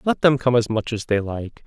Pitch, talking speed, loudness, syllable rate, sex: 120 Hz, 290 wpm, -21 LUFS, 5.1 syllables/s, male